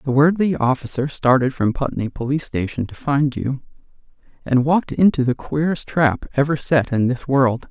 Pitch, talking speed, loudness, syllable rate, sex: 135 Hz, 170 wpm, -19 LUFS, 5.1 syllables/s, male